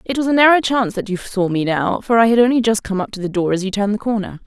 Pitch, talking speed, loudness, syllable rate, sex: 215 Hz, 335 wpm, -17 LUFS, 6.9 syllables/s, female